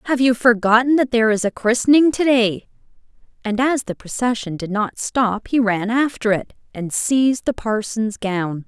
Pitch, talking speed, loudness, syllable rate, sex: 230 Hz, 180 wpm, -18 LUFS, 4.8 syllables/s, female